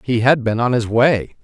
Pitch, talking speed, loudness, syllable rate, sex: 120 Hz, 250 wpm, -16 LUFS, 4.6 syllables/s, male